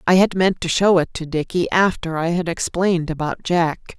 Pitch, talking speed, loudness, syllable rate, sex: 170 Hz, 210 wpm, -19 LUFS, 5.2 syllables/s, female